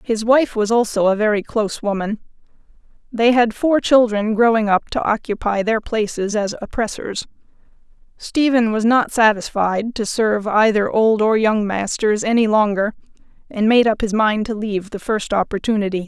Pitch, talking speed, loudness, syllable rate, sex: 215 Hz, 160 wpm, -18 LUFS, 4.9 syllables/s, female